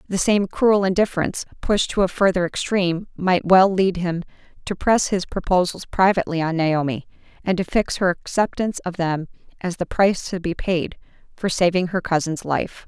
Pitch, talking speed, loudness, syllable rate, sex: 180 Hz, 175 wpm, -21 LUFS, 5.2 syllables/s, female